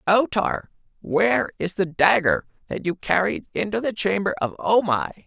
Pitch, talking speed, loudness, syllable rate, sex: 185 Hz, 170 wpm, -22 LUFS, 4.7 syllables/s, male